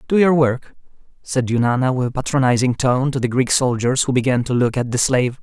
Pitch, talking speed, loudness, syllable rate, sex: 130 Hz, 220 wpm, -18 LUFS, 5.9 syllables/s, male